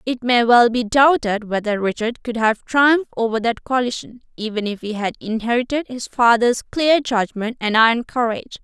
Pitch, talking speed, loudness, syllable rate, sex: 235 Hz, 175 wpm, -18 LUFS, 5.2 syllables/s, female